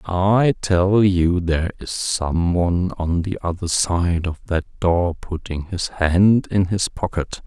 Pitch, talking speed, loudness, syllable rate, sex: 90 Hz, 160 wpm, -20 LUFS, 3.6 syllables/s, male